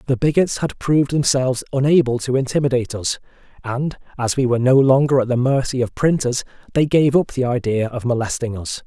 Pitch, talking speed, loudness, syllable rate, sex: 130 Hz, 190 wpm, -18 LUFS, 5.9 syllables/s, male